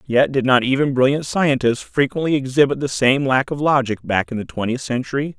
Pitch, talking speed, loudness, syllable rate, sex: 135 Hz, 200 wpm, -18 LUFS, 5.5 syllables/s, male